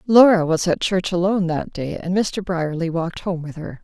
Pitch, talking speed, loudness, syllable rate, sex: 175 Hz, 220 wpm, -20 LUFS, 5.2 syllables/s, female